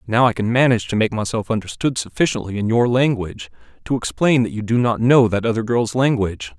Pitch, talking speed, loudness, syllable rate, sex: 115 Hz, 210 wpm, -18 LUFS, 6.1 syllables/s, male